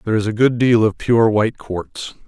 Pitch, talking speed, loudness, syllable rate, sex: 110 Hz, 240 wpm, -17 LUFS, 5.3 syllables/s, male